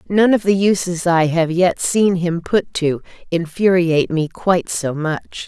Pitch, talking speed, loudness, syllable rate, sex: 175 Hz, 175 wpm, -17 LUFS, 4.3 syllables/s, female